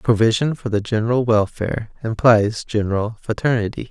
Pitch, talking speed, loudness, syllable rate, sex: 115 Hz, 125 wpm, -19 LUFS, 5.3 syllables/s, male